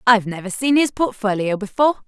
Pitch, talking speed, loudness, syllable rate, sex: 225 Hz, 175 wpm, -19 LUFS, 6.5 syllables/s, female